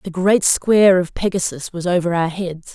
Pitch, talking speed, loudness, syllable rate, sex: 180 Hz, 195 wpm, -17 LUFS, 4.9 syllables/s, female